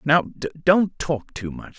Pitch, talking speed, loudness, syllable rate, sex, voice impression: 150 Hz, 170 wpm, -22 LUFS, 3.0 syllables/s, male, masculine, slightly middle-aged, thick, tensed, bright, slightly soft, intellectual, slightly calm, mature, wild, lively, slightly intense